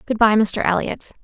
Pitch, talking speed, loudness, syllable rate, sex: 215 Hz, 195 wpm, -18 LUFS, 5.0 syllables/s, female